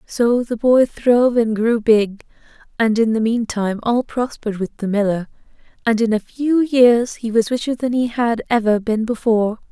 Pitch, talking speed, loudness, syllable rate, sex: 230 Hz, 185 wpm, -18 LUFS, 4.8 syllables/s, female